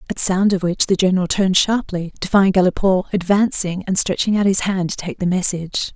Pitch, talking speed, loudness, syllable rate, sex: 185 Hz, 210 wpm, -18 LUFS, 5.9 syllables/s, female